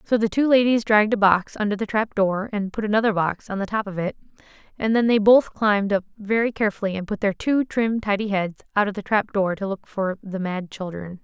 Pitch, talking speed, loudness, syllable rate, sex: 205 Hz, 245 wpm, -22 LUFS, 5.7 syllables/s, female